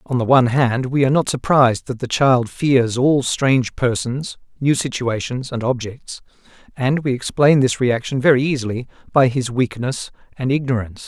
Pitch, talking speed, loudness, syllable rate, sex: 130 Hz, 170 wpm, -18 LUFS, 5.0 syllables/s, male